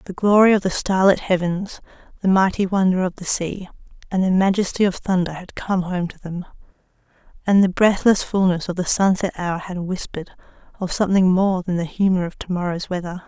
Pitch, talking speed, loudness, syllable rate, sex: 185 Hz, 185 wpm, -20 LUFS, 5.6 syllables/s, female